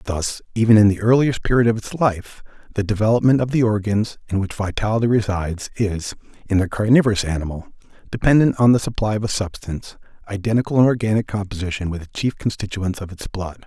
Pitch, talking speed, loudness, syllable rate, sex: 105 Hz, 180 wpm, -20 LUFS, 6.2 syllables/s, male